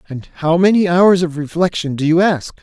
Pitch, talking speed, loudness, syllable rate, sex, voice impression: 170 Hz, 205 wpm, -15 LUFS, 5.0 syllables/s, male, very masculine, very middle-aged, very thick, slightly tensed, very powerful, slightly dark, soft, clear, fluent, raspy, cool, very intellectual, refreshing, sincere, very calm, mature, friendly, reassuring, very unique, slightly elegant, wild, sweet, lively, kind, modest